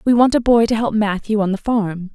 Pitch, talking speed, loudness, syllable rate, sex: 215 Hz, 280 wpm, -17 LUFS, 5.4 syllables/s, female